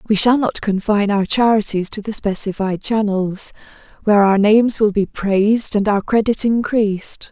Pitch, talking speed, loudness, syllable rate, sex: 210 Hz, 165 wpm, -17 LUFS, 5.0 syllables/s, female